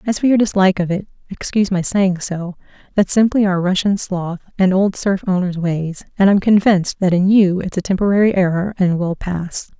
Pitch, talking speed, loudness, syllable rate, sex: 190 Hz, 200 wpm, -17 LUFS, 5.4 syllables/s, female